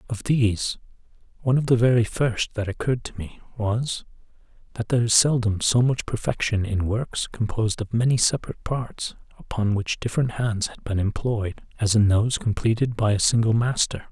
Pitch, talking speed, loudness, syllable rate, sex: 110 Hz, 175 wpm, -23 LUFS, 5.4 syllables/s, male